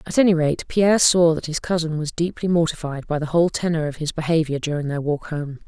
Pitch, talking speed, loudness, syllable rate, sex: 160 Hz, 235 wpm, -21 LUFS, 6.0 syllables/s, female